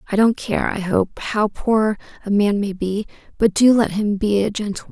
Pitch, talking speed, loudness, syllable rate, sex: 210 Hz, 220 wpm, -19 LUFS, 5.0 syllables/s, female